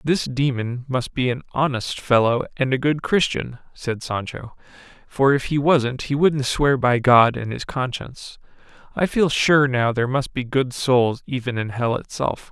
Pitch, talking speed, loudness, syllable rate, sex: 130 Hz, 180 wpm, -21 LUFS, 4.4 syllables/s, male